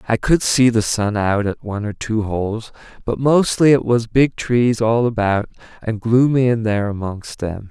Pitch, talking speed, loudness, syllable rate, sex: 115 Hz, 195 wpm, -18 LUFS, 4.7 syllables/s, male